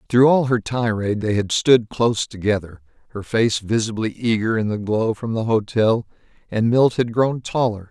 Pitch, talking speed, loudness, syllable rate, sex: 115 Hz, 180 wpm, -20 LUFS, 4.9 syllables/s, male